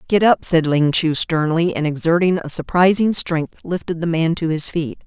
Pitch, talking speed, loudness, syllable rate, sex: 165 Hz, 200 wpm, -18 LUFS, 4.8 syllables/s, female